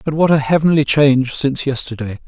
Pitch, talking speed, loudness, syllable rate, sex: 140 Hz, 185 wpm, -15 LUFS, 6.2 syllables/s, male